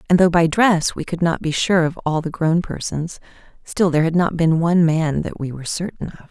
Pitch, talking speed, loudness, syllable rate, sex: 165 Hz, 245 wpm, -19 LUFS, 5.5 syllables/s, female